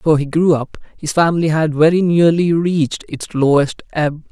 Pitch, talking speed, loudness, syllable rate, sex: 160 Hz, 180 wpm, -15 LUFS, 5.3 syllables/s, male